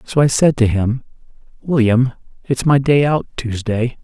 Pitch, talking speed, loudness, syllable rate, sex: 125 Hz, 165 wpm, -16 LUFS, 4.3 syllables/s, male